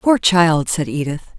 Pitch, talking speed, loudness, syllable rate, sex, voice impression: 165 Hz, 175 wpm, -16 LUFS, 4.1 syllables/s, female, feminine, adult-like, tensed, powerful, clear, fluent, intellectual, calm, elegant, lively, strict, sharp